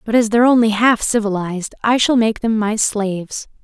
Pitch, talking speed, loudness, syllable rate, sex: 220 Hz, 200 wpm, -16 LUFS, 5.4 syllables/s, female